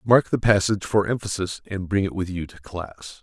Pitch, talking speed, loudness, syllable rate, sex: 95 Hz, 225 wpm, -23 LUFS, 5.2 syllables/s, male